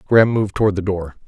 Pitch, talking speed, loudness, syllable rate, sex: 100 Hz, 235 wpm, -18 LUFS, 7.6 syllables/s, male